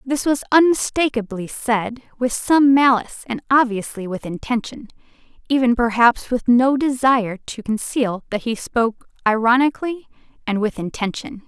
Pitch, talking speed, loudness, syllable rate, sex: 240 Hz, 130 wpm, -19 LUFS, 4.8 syllables/s, female